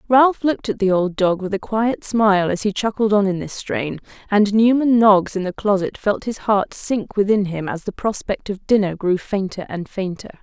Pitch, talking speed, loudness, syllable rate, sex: 200 Hz, 220 wpm, -19 LUFS, 4.9 syllables/s, female